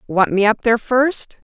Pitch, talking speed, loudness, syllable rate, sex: 230 Hz, 200 wpm, -17 LUFS, 4.8 syllables/s, female